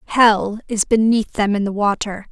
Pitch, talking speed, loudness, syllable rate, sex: 210 Hz, 180 wpm, -17 LUFS, 4.5 syllables/s, female